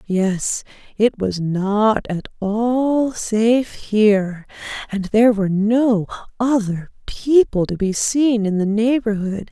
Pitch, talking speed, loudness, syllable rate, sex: 215 Hz, 125 wpm, -18 LUFS, 3.5 syllables/s, female